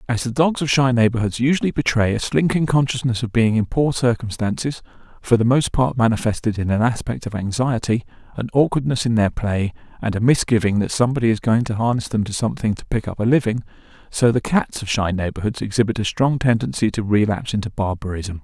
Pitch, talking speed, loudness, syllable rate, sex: 115 Hz, 195 wpm, -20 LUFS, 6.0 syllables/s, male